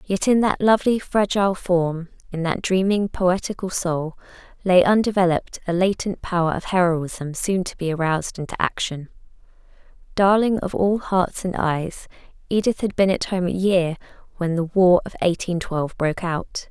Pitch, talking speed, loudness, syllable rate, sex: 185 Hz, 160 wpm, -21 LUFS, 4.9 syllables/s, female